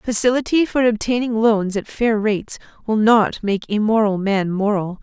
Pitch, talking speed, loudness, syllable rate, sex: 215 Hz, 155 wpm, -18 LUFS, 4.7 syllables/s, female